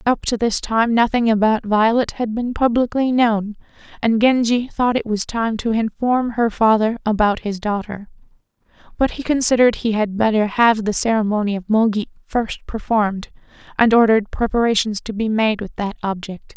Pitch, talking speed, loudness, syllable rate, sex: 220 Hz, 165 wpm, -18 LUFS, 5.0 syllables/s, female